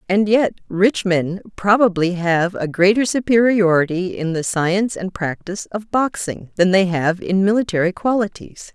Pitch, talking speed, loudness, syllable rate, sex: 190 Hz, 150 wpm, -18 LUFS, 4.7 syllables/s, female